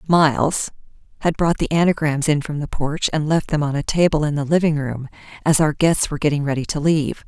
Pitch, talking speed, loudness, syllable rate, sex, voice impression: 150 Hz, 215 wpm, -19 LUFS, 5.8 syllables/s, female, very feminine, very adult-like, middle-aged, slightly thin, slightly tensed, weak, slightly dark, hard, clear, fluent, slightly raspy, very cool, intellectual, refreshing, very sincere, very calm, friendly, reassuring, slightly unique, very elegant, slightly wild, slightly sweet, slightly lively, strict, slightly modest, slightly light